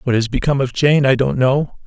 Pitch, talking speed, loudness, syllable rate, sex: 135 Hz, 260 wpm, -16 LUFS, 5.8 syllables/s, male